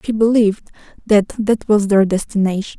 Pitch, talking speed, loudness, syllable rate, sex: 210 Hz, 150 wpm, -16 LUFS, 5.1 syllables/s, female